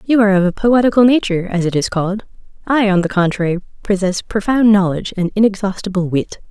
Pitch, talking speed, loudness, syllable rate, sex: 195 Hz, 175 wpm, -15 LUFS, 6.4 syllables/s, female